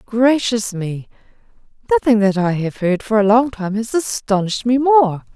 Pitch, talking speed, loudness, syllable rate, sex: 215 Hz, 155 wpm, -17 LUFS, 4.7 syllables/s, female